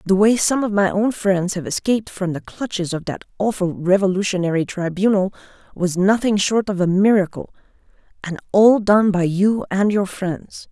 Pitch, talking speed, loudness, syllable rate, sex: 195 Hz, 170 wpm, -18 LUFS, 5.0 syllables/s, female